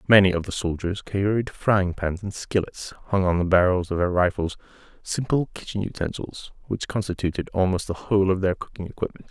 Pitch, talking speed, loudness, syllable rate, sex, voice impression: 95 Hz, 180 wpm, -24 LUFS, 5.6 syllables/s, male, very masculine, middle-aged, thick, relaxed, slightly powerful, slightly dark, soft, muffled, fluent, raspy, cool, very intellectual, slightly refreshing, very sincere, very calm, very mature, friendly, very reassuring, very unique, very elegant, wild, sweet, lively, kind, slightly modest